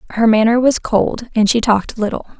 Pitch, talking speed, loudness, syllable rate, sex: 225 Hz, 200 wpm, -15 LUFS, 5.6 syllables/s, female